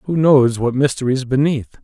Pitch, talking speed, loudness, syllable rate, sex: 135 Hz, 165 wpm, -16 LUFS, 5.2 syllables/s, male